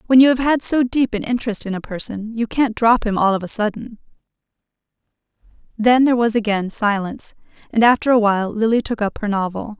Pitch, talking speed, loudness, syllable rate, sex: 220 Hz, 200 wpm, -18 LUFS, 5.9 syllables/s, female